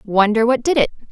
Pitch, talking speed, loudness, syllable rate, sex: 230 Hz, 215 wpm, -16 LUFS, 5.6 syllables/s, female